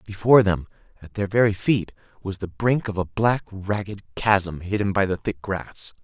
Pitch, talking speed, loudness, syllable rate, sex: 100 Hz, 190 wpm, -23 LUFS, 4.6 syllables/s, male